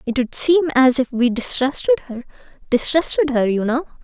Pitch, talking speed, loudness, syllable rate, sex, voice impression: 265 Hz, 165 wpm, -17 LUFS, 5.0 syllables/s, female, feminine, slightly young, slightly bright, slightly cute, slightly refreshing, friendly